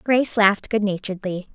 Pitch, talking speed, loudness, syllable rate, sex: 205 Hz, 155 wpm, -21 LUFS, 6.3 syllables/s, female